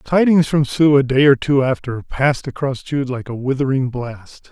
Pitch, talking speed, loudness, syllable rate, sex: 135 Hz, 200 wpm, -17 LUFS, 4.9 syllables/s, male